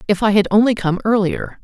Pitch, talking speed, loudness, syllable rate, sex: 205 Hz, 220 wpm, -16 LUFS, 5.8 syllables/s, female